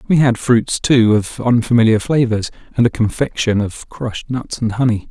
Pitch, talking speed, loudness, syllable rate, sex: 115 Hz, 175 wpm, -16 LUFS, 4.9 syllables/s, male